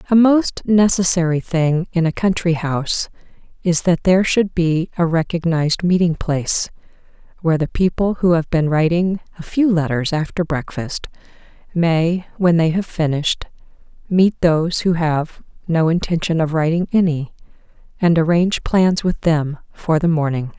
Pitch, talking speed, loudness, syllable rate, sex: 170 Hz, 150 wpm, -18 LUFS, 4.7 syllables/s, female